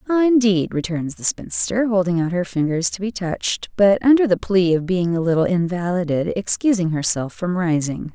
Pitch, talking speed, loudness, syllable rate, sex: 185 Hz, 185 wpm, -19 LUFS, 5.1 syllables/s, female